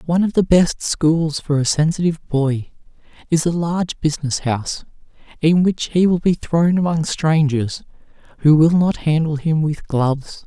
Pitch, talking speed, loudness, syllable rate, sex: 160 Hz, 165 wpm, -18 LUFS, 4.8 syllables/s, male